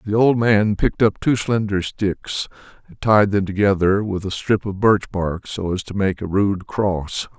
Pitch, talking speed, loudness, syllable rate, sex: 100 Hz, 205 wpm, -19 LUFS, 4.3 syllables/s, male